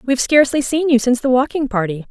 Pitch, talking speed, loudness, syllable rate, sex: 260 Hz, 255 wpm, -16 LUFS, 7.1 syllables/s, female